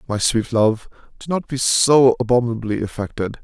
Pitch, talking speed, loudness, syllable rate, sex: 120 Hz, 155 wpm, -18 LUFS, 5.2 syllables/s, male